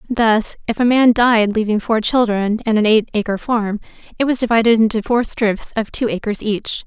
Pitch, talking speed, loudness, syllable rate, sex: 225 Hz, 200 wpm, -16 LUFS, 5.0 syllables/s, female